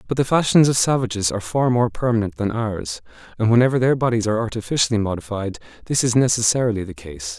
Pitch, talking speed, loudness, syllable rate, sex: 110 Hz, 185 wpm, -20 LUFS, 6.6 syllables/s, male